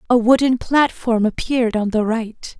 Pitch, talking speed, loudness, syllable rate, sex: 235 Hz, 160 wpm, -18 LUFS, 4.6 syllables/s, female